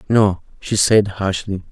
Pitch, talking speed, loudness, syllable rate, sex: 100 Hz, 140 wpm, -17 LUFS, 3.8 syllables/s, male